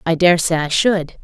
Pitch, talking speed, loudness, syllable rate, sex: 170 Hz, 245 wpm, -16 LUFS, 4.6 syllables/s, female